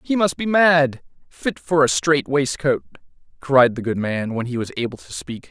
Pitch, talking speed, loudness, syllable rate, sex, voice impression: 140 Hz, 205 wpm, -20 LUFS, 4.6 syllables/s, male, masculine, adult-like, slightly clear, slightly cool, refreshing, sincere, slightly kind